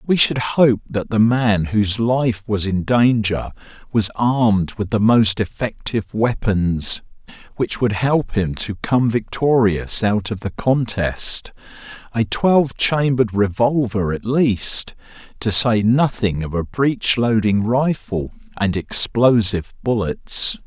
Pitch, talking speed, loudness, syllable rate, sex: 110 Hz, 135 wpm, -18 LUFS, 3.7 syllables/s, male